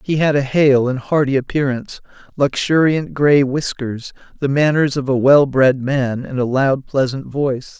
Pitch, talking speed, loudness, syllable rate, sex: 135 Hz, 170 wpm, -16 LUFS, 4.5 syllables/s, male